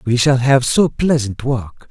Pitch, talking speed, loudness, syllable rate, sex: 130 Hz, 190 wpm, -16 LUFS, 3.9 syllables/s, male